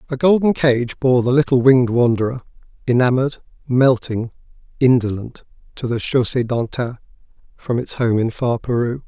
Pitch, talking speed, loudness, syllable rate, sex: 125 Hz, 140 wpm, -18 LUFS, 5.1 syllables/s, male